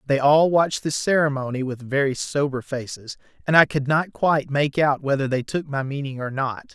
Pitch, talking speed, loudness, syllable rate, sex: 140 Hz, 205 wpm, -22 LUFS, 5.3 syllables/s, male